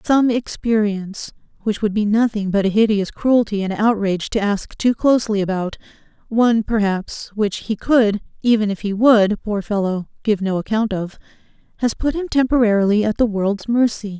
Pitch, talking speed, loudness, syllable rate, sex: 215 Hz, 160 wpm, -19 LUFS, 5.0 syllables/s, female